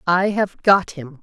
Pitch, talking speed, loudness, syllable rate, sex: 180 Hz, 195 wpm, -18 LUFS, 3.9 syllables/s, female